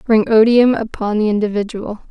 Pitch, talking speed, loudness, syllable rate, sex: 220 Hz, 145 wpm, -15 LUFS, 5.1 syllables/s, female